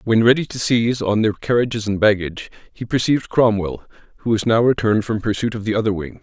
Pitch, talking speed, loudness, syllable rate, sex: 110 Hz, 210 wpm, -19 LUFS, 6.3 syllables/s, male